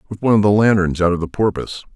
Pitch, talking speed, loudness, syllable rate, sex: 100 Hz, 275 wpm, -16 LUFS, 7.9 syllables/s, male